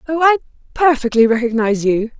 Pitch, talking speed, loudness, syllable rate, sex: 255 Hz, 135 wpm, -15 LUFS, 6.3 syllables/s, female